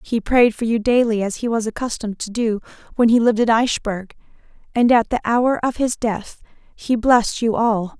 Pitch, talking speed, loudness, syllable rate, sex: 230 Hz, 205 wpm, -19 LUFS, 5.2 syllables/s, female